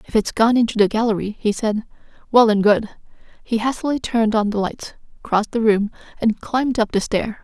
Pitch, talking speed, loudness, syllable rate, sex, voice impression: 220 Hz, 200 wpm, -19 LUFS, 5.7 syllables/s, female, very feminine, adult-like, thin, very tensed, slightly powerful, bright, slightly hard, clear, fluent, slightly raspy, cute, very intellectual, refreshing, sincere, slightly calm, friendly, reassuring, unique, elegant, slightly wild, sweet, lively, kind, intense, slightly sharp, slightly modest